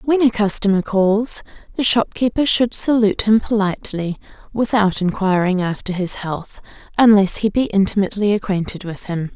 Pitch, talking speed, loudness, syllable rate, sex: 205 Hz, 140 wpm, -18 LUFS, 5.1 syllables/s, female